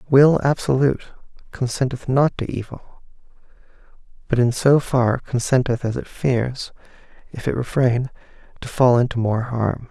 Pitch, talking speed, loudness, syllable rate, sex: 125 Hz, 135 wpm, -20 LUFS, 4.6 syllables/s, male